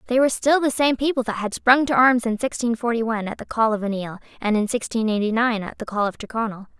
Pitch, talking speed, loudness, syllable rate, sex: 230 Hz, 265 wpm, -21 LUFS, 6.4 syllables/s, female